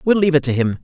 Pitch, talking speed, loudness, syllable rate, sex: 155 Hz, 360 wpm, -16 LUFS, 8.3 syllables/s, male